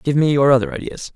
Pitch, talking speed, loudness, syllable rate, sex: 140 Hz, 260 wpm, -17 LUFS, 6.7 syllables/s, male